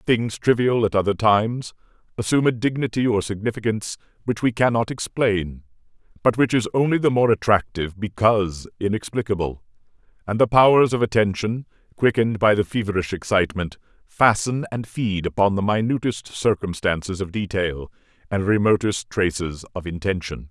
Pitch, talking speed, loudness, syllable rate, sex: 105 Hz, 140 wpm, -21 LUFS, 5.4 syllables/s, male